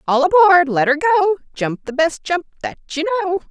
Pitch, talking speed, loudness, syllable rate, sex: 320 Hz, 205 wpm, -16 LUFS, 6.3 syllables/s, female